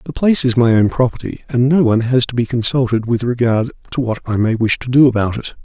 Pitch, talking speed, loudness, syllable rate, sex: 120 Hz, 255 wpm, -15 LUFS, 6.3 syllables/s, male